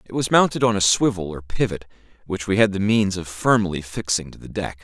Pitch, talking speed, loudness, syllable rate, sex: 100 Hz, 235 wpm, -21 LUFS, 5.6 syllables/s, male